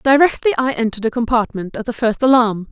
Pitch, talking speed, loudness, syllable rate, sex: 240 Hz, 200 wpm, -17 LUFS, 6.1 syllables/s, female